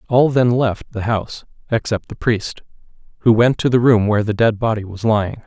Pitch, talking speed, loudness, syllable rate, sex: 115 Hz, 210 wpm, -17 LUFS, 5.4 syllables/s, male